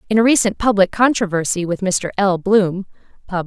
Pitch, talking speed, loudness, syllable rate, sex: 195 Hz, 175 wpm, -17 LUFS, 5.4 syllables/s, female